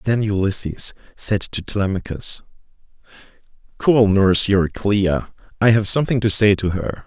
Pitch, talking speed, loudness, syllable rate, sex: 100 Hz, 125 wpm, -18 LUFS, 5.0 syllables/s, male